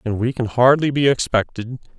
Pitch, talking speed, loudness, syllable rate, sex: 125 Hz, 180 wpm, -18 LUFS, 5.3 syllables/s, male